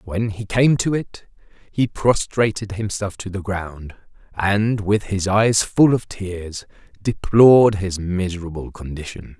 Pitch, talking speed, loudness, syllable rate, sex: 100 Hz, 140 wpm, -19 LUFS, 3.9 syllables/s, male